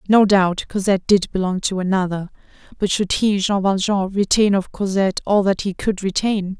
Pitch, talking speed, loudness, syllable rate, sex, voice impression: 195 Hz, 180 wpm, -19 LUFS, 5.1 syllables/s, female, feminine, adult-like, tensed, slightly powerful, slightly hard, fluent, intellectual, calm, elegant, lively, slightly strict, sharp